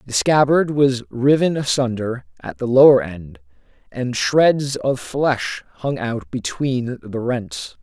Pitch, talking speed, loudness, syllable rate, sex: 120 Hz, 140 wpm, -19 LUFS, 3.6 syllables/s, male